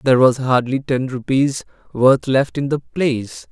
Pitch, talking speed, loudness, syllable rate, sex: 130 Hz, 170 wpm, -18 LUFS, 4.5 syllables/s, male